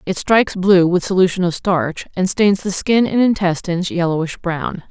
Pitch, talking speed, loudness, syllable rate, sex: 180 Hz, 185 wpm, -16 LUFS, 5.0 syllables/s, female